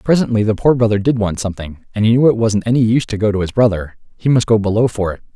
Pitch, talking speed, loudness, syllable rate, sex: 110 Hz, 280 wpm, -15 LUFS, 7.0 syllables/s, male